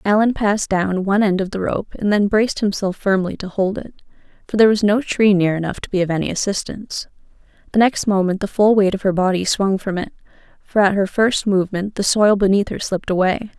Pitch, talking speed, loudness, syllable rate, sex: 200 Hz, 225 wpm, -18 LUFS, 6.0 syllables/s, female